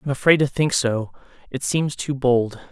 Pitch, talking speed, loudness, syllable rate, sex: 135 Hz, 220 wpm, -20 LUFS, 4.9 syllables/s, male